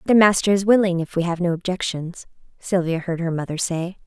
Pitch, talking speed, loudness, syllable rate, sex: 180 Hz, 205 wpm, -21 LUFS, 5.5 syllables/s, female